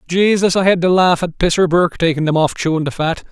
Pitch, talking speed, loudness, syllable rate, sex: 175 Hz, 255 wpm, -15 LUFS, 6.1 syllables/s, male